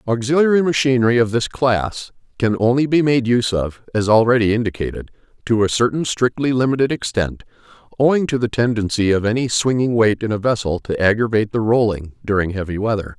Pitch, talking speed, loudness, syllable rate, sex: 115 Hz, 175 wpm, -18 LUFS, 5.9 syllables/s, male